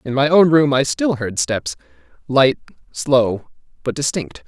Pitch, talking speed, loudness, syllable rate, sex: 135 Hz, 160 wpm, -17 LUFS, 4.1 syllables/s, male